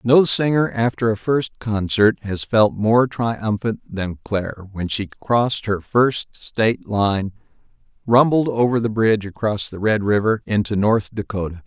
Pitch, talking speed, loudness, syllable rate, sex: 110 Hz, 155 wpm, -19 LUFS, 4.3 syllables/s, male